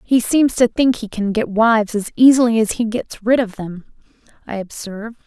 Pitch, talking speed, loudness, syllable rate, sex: 220 Hz, 205 wpm, -17 LUFS, 5.2 syllables/s, female